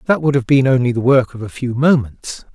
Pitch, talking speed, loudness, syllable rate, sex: 130 Hz, 260 wpm, -15 LUFS, 5.6 syllables/s, male